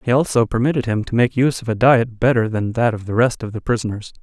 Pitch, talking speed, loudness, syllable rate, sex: 115 Hz, 270 wpm, -18 LUFS, 6.4 syllables/s, male